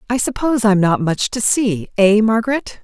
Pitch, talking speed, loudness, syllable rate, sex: 215 Hz, 210 wpm, -16 LUFS, 5.5 syllables/s, female